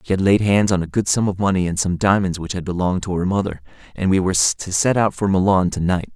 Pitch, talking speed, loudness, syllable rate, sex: 95 Hz, 285 wpm, -19 LUFS, 6.3 syllables/s, male